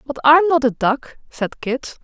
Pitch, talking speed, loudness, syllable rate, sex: 270 Hz, 205 wpm, -17 LUFS, 4.1 syllables/s, female